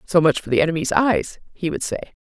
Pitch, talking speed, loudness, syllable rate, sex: 175 Hz, 245 wpm, -20 LUFS, 5.7 syllables/s, female